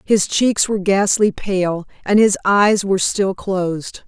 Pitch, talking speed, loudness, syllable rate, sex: 195 Hz, 160 wpm, -17 LUFS, 4.0 syllables/s, female